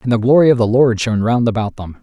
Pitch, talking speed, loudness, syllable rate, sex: 115 Hz, 295 wpm, -14 LUFS, 6.6 syllables/s, male